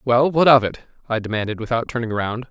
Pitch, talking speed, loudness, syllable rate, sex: 120 Hz, 215 wpm, -19 LUFS, 6.0 syllables/s, male